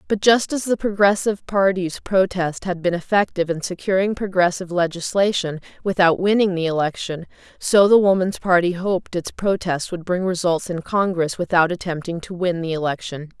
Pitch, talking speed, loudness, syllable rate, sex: 180 Hz, 160 wpm, -20 LUFS, 5.3 syllables/s, female